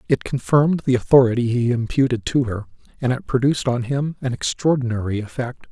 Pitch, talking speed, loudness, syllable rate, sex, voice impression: 125 Hz, 170 wpm, -20 LUFS, 5.8 syllables/s, male, very masculine, very adult-like, old, very thick, slightly relaxed, slightly weak, slightly bright, very soft, very muffled, slightly halting, raspy, cool, intellectual, sincere, very calm, very mature, very friendly, very reassuring, very unique, very elegant, wild, very sweet, very kind, very modest